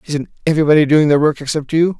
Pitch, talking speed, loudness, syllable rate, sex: 150 Hz, 210 wpm, -14 LUFS, 7.0 syllables/s, male